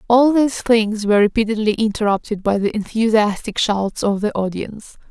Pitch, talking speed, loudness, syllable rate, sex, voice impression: 215 Hz, 155 wpm, -18 LUFS, 5.5 syllables/s, female, very feminine, very adult-like, thin, tensed, slightly weak, bright, slightly soft, clear, fluent, slightly raspy, cute, intellectual, refreshing, sincere, calm, very friendly, reassuring, very unique, elegant, slightly wild, sweet, lively, kind, slightly intense, slightly sharp, slightly modest, light